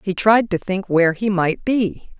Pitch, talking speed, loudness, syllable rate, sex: 195 Hz, 220 wpm, -18 LUFS, 4.4 syllables/s, female